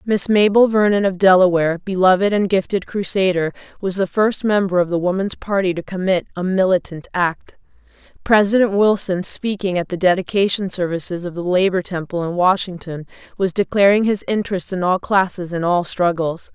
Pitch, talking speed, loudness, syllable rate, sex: 185 Hz, 165 wpm, -18 LUFS, 5.3 syllables/s, female